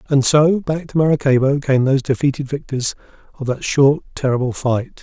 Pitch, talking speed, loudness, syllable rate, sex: 140 Hz, 165 wpm, -17 LUFS, 5.4 syllables/s, male